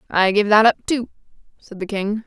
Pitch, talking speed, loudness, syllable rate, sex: 210 Hz, 210 wpm, -18 LUFS, 5.1 syllables/s, female